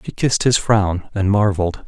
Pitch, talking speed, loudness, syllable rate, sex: 100 Hz, 190 wpm, -17 LUFS, 5.2 syllables/s, male